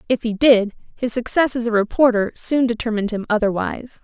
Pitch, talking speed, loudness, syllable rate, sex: 230 Hz, 180 wpm, -19 LUFS, 5.8 syllables/s, female